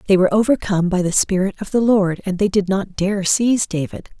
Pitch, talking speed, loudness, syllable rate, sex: 195 Hz, 230 wpm, -18 LUFS, 6.0 syllables/s, female